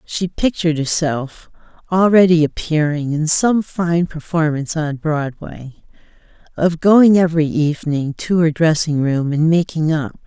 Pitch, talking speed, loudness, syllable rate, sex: 160 Hz, 130 wpm, -16 LUFS, 4.4 syllables/s, female